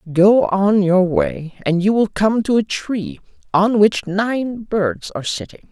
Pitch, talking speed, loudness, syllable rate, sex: 190 Hz, 180 wpm, -17 LUFS, 3.8 syllables/s, male